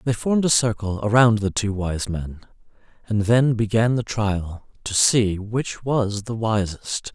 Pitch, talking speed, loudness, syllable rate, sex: 110 Hz, 170 wpm, -21 LUFS, 4.0 syllables/s, male